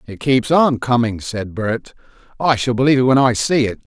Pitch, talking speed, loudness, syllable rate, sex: 125 Hz, 195 wpm, -17 LUFS, 5.0 syllables/s, male